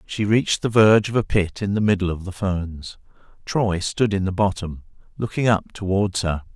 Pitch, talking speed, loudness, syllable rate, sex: 100 Hz, 200 wpm, -21 LUFS, 5.1 syllables/s, male